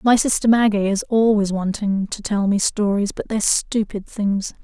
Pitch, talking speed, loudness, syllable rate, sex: 205 Hz, 180 wpm, -19 LUFS, 4.8 syllables/s, female